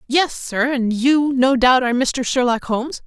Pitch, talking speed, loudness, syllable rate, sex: 255 Hz, 195 wpm, -17 LUFS, 4.5 syllables/s, female